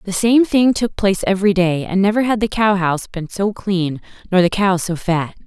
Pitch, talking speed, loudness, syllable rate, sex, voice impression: 195 Hz, 230 wpm, -17 LUFS, 5.2 syllables/s, female, feminine, slightly adult-like, clear, fluent, slightly intellectual, slightly refreshing, friendly